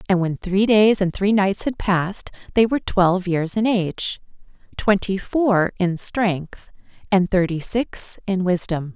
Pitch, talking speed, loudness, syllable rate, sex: 190 Hz, 160 wpm, -20 LUFS, 4.2 syllables/s, female